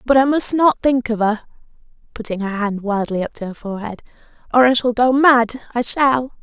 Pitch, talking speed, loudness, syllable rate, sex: 235 Hz, 205 wpm, -17 LUFS, 5.4 syllables/s, female